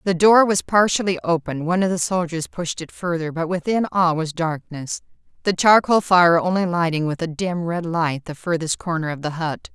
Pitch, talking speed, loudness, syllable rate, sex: 170 Hz, 205 wpm, -20 LUFS, 5.0 syllables/s, female